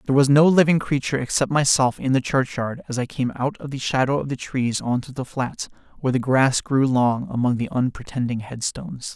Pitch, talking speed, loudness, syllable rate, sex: 135 Hz, 215 wpm, -21 LUFS, 5.7 syllables/s, male